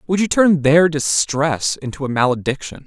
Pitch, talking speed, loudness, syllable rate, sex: 150 Hz, 165 wpm, -17 LUFS, 4.9 syllables/s, male